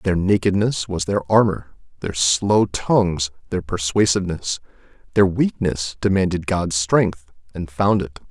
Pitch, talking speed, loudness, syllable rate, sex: 90 Hz, 130 wpm, -20 LUFS, 4.2 syllables/s, male